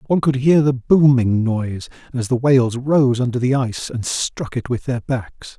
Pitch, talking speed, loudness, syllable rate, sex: 125 Hz, 205 wpm, -18 LUFS, 4.8 syllables/s, male